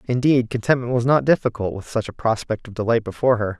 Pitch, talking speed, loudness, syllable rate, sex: 115 Hz, 215 wpm, -21 LUFS, 6.4 syllables/s, male